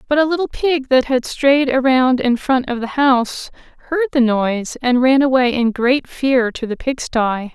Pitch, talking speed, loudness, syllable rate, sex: 260 Hz, 200 wpm, -16 LUFS, 4.5 syllables/s, female